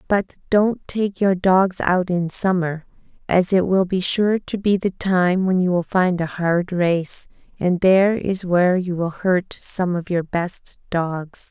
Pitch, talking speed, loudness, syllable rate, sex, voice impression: 180 Hz, 190 wpm, -20 LUFS, 3.8 syllables/s, female, very feminine, slightly young, slightly adult-like, very thin, relaxed, slightly weak, slightly dark, slightly hard, slightly muffled, slightly halting, very cute, intellectual, sincere, very calm, very friendly, very reassuring, unique, very elegant, very sweet, very kind